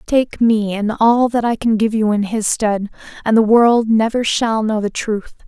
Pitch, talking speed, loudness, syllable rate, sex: 220 Hz, 220 wpm, -16 LUFS, 4.3 syllables/s, female